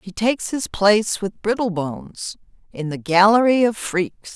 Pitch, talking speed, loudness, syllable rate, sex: 200 Hz, 150 wpm, -19 LUFS, 4.8 syllables/s, female